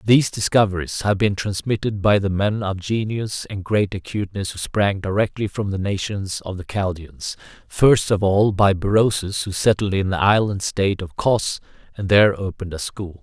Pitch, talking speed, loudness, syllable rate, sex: 100 Hz, 180 wpm, -20 LUFS, 5.0 syllables/s, male